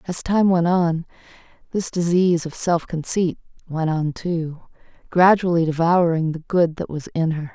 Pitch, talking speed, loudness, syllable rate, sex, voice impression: 170 Hz, 160 wpm, -20 LUFS, 4.6 syllables/s, female, very feminine, adult-like, calm, slightly strict